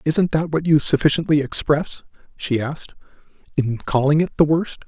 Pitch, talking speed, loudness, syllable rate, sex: 150 Hz, 160 wpm, -19 LUFS, 5.0 syllables/s, male